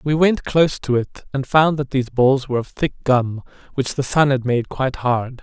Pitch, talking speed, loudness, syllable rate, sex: 135 Hz, 230 wpm, -19 LUFS, 5.2 syllables/s, male